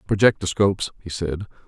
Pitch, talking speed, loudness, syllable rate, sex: 95 Hz, 110 wpm, -22 LUFS, 6.0 syllables/s, male